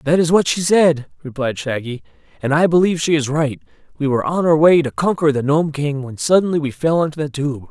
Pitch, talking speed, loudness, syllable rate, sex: 150 Hz, 235 wpm, -17 LUFS, 5.7 syllables/s, male